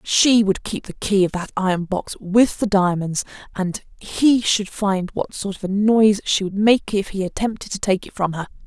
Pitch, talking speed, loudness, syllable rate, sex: 200 Hz, 230 wpm, -20 LUFS, 4.8 syllables/s, female